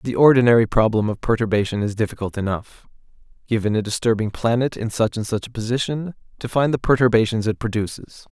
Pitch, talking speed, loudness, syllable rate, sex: 115 Hz, 170 wpm, -20 LUFS, 6.1 syllables/s, male